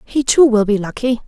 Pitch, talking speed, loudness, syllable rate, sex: 230 Hz, 235 wpm, -15 LUFS, 5.3 syllables/s, female